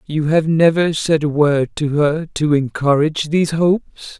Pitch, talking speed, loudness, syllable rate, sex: 155 Hz, 170 wpm, -16 LUFS, 4.5 syllables/s, female